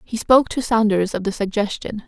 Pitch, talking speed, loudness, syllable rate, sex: 215 Hz, 200 wpm, -19 LUFS, 5.6 syllables/s, female